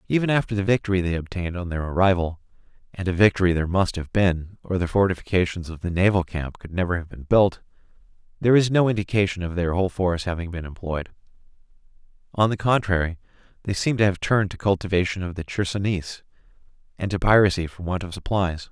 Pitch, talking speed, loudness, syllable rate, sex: 95 Hz, 185 wpm, -23 LUFS, 6.5 syllables/s, male